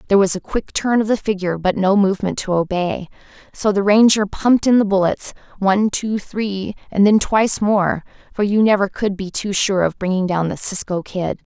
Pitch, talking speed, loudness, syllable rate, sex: 200 Hz, 190 wpm, -18 LUFS, 5.4 syllables/s, female